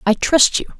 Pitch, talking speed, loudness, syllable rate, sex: 255 Hz, 230 wpm, -14 LUFS, 5.4 syllables/s, female